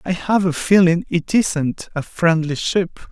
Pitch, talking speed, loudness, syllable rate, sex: 170 Hz, 175 wpm, -18 LUFS, 3.8 syllables/s, male